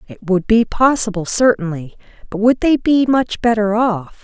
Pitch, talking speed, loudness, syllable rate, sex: 215 Hz, 170 wpm, -15 LUFS, 4.5 syllables/s, female